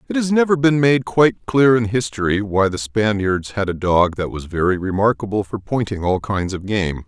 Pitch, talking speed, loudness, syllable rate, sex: 110 Hz, 210 wpm, -18 LUFS, 5.1 syllables/s, male